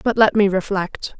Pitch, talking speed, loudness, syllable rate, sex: 200 Hz, 200 wpm, -18 LUFS, 4.7 syllables/s, female